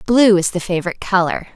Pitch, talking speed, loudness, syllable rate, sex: 190 Hz, 195 wpm, -16 LUFS, 6.7 syllables/s, female